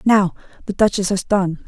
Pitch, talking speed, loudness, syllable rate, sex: 195 Hz, 145 wpm, -18 LUFS, 4.8 syllables/s, female